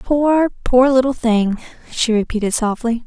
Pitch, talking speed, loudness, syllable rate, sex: 245 Hz, 135 wpm, -16 LUFS, 4.4 syllables/s, female